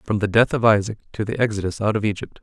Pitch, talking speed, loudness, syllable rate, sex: 105 Hz, 275 wpm, -21 LUFS, 6.9 syllables/s, male